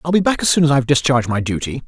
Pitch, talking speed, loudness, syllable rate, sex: 140 Hz, 290 wpm, -16 LUFS, 7.4 syllables/s, male